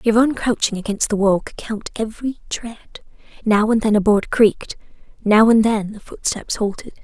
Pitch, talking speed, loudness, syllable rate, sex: 215 Hz, 160 wpm, -18 LUFS, 5.1 syllables/s, female